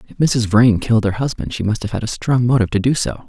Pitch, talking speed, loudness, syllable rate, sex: 115 Hz, 295 wpm, -17 LUFS, 6.5 syllables/s, male